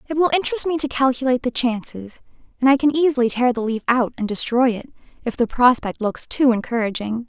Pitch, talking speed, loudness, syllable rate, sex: 250 Hz, 205 wpm, -19 LUFS, 6.0 syllables/s, female